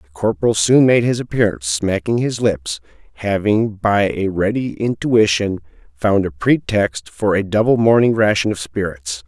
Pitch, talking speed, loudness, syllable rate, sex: 100 Hz, 155 wpm, -17 LUFS, 4.6 syllables/s, male